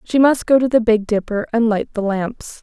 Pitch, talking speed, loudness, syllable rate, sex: 225 Hz, 250 wpm, -17 LUFS, 4.8 syllables/s, female